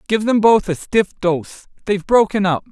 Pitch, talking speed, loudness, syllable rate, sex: 195 Hz, 200 wpm, -17 LUFS, 4.8 syllables/s, male